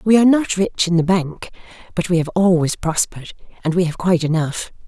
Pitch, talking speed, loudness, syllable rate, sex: 175 Hz, 210 wpm, -18 LUFS, 5.9 syllables/s, female